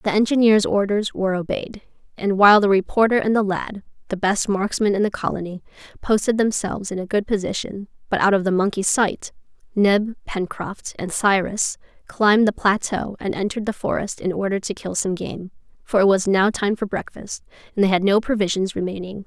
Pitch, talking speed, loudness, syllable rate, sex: 200 Hz, 185 wpm, -20 LUFS, 5.4 syllables/s, female